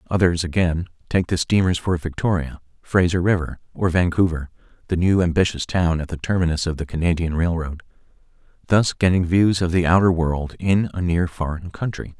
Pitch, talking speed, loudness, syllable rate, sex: 85 Hz, 165 wpm, -21 LUFS, 5.3 syllables/s, male